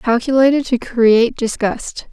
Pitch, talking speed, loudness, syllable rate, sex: 240 Hz, 115 wpm, -15 LUFS, 4.5 syllables/s, female